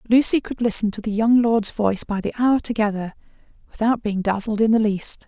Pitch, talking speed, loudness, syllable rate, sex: 220 Hz, 195 wpm, -20 LUFS, 5.6 syllables/s, female